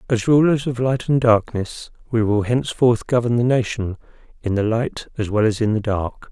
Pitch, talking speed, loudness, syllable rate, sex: 115 Hz, 200 wpm, -19 LUFS, 5.0 syllables/s, male